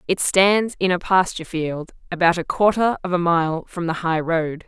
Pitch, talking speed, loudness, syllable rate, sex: 175 Hz, 205 wpm, -20 LUFS, 4.7 syllables/s, female